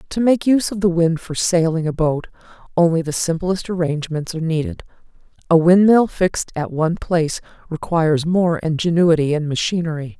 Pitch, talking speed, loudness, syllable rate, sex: 170 Hz, 160 wpm, -18 LUFS, 5.6 syllables/s, female